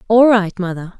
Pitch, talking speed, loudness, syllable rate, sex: 205 Hz, 180 wpm, -15 LUFS, 5.0 syllables/s, female